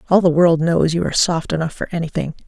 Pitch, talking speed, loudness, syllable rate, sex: 165 Hz, 240 wpm, -17 LUFS, 6.5 syllables/s, female